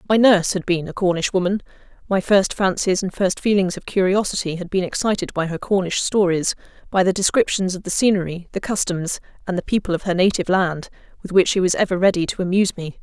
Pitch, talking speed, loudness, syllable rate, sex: 185 Hz, 210 wpm, -20 LUFS, 6.2 syllables/s, female